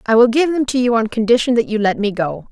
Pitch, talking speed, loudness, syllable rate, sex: 230 Hz, 310 wpm, -16 LUFS, 6.3 syllables/s, female